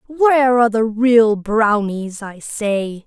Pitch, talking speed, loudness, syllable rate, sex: 225 Hz, 135 wpm, -16 LUFS, 3.4 syllables/s, female